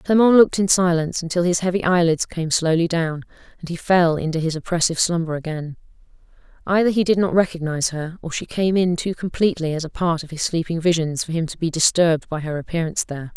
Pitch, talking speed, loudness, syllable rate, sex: 170 Hz, 210 wpm, -20 LUFS, 6.3 syllables/s, female